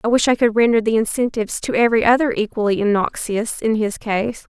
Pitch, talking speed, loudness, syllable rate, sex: 225 Hz, 195 wpm, -18 LUFS, 5.9 syllables/s, female